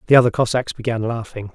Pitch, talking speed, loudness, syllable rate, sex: 115 Hz, 195 wpm, -19 LUFS, 6.6 syllables/s, male